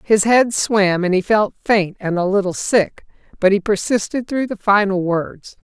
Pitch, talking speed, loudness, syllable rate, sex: 200 Hz, 190 wpm, -17 LUFS, 4.4 syllables/s, female